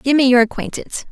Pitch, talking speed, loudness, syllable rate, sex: 255 Hz, 215 wpm, -16 LUFS, 6.7 syllables/s, female